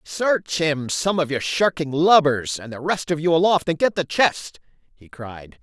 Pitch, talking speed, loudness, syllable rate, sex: 155 Hz, 205 wpm, -20 LUFS, 4.2 syllables/s, male